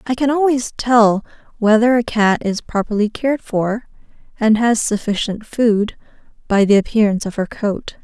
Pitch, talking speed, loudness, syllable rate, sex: 225 Hz, 155 wpm, -17 LUFS, 4.8 syllables/s, female